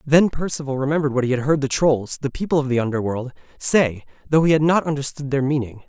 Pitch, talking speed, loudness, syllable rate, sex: 140 Hz, 205 wpm, -20 LUFS, 6.3 syllables/s, male